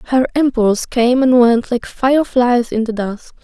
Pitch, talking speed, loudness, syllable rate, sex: 245 Hz, 175 wpm, -15 LUFS, 4.6 syllables/s, female